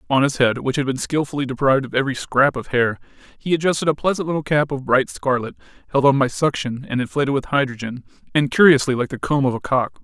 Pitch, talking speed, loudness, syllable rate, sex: 135 Hz, 225 wpm, -19 LUFS, 6.4 syllables/s, male